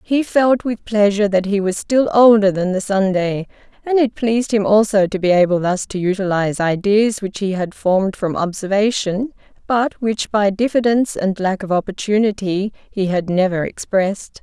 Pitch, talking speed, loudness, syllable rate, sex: 205 Hz, 175 wpm, -17 LUFS, 5.0 syllables/s, female